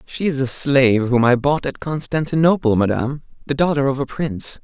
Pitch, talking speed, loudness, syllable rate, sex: 135 Hz, 195 wpm, -18 LUFS, 5.6 syllables/s, male